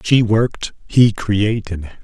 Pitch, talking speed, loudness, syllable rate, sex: 105 Hz, 120 wpm, -16 LUFS, 3.6 syllables/s, male